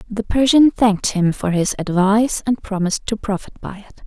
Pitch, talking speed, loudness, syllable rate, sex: 210 Hz, 190 wpm, -17 LUFS, 5.4 syllables/s, female